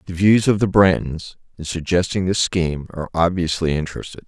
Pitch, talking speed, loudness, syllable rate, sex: 90 Hz, 170 wpm, -19 LUFS, 5.8 syllables/s, male